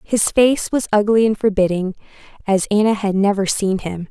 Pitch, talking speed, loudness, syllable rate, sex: 205 Hz, 175 wpm, -17 LUFS, 5.0 syllables/s, female